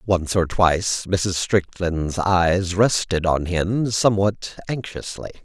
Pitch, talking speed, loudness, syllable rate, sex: 95 Hz, 120 wpm, -21 LUFS, 3.5 syllables/s, male